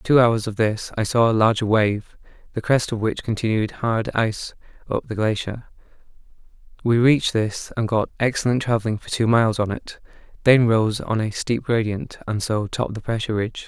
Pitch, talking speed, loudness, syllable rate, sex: 110 Hz, 195 wpm, -21 LUFS, 5.5 syllables/s, male